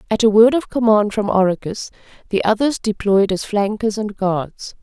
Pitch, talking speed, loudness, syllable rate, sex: 210 Hz, 175 wpm, -17 LUFS, 4.8 syllables/s, female